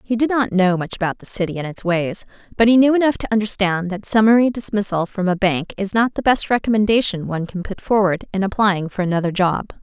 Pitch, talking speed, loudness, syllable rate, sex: 200 Hz, 225 wpm, -18 LUFS, 6.0 syllables/s, female